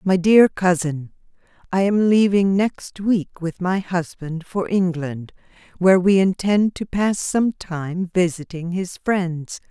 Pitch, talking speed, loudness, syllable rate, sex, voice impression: 180 Hz, 140 wpm, -20 LUFS, 3.7 syllables/s, female, feminine, adult-like, clear, slightly intellectual, slightly elegant